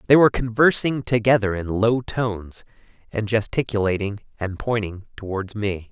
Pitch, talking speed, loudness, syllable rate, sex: 110 Hz, 130 wpm, -22 LUFS, 5.0 syllables/s, male